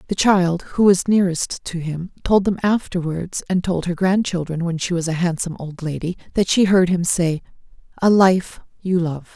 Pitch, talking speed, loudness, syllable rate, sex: 180 Hz, 190 wpm, -19 LUFS, 4.9 syllables/s, female